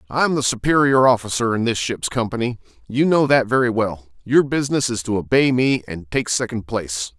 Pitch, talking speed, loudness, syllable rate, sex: 115 Hz, 175 wpm, -19 LUFS, 5.4 syllables/s, male